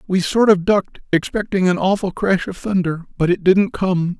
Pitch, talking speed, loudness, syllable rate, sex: 185 Hz, 200 wpm, -18 LUFS, 5.0 syllables/s, male